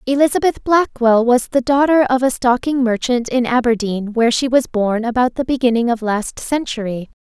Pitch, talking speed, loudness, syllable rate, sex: 245 Hz, 175 wpm, -16 LUFS, 5.2 syllables/s, female